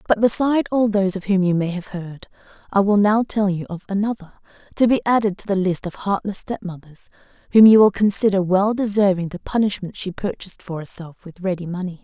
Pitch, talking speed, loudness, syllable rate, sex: 195 Hz, 205 wpm, -19 LUFS, 5.8 syllables/s, female